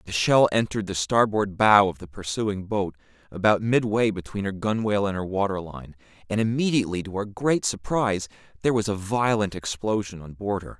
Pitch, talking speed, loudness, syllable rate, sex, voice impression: 100 Hz, 185 wpm, -24 LUFS, 5.5 syllables/s, male, masculine, middle-aged, slightly thick, tensed, slightly powerful, cool, wild, slightly intense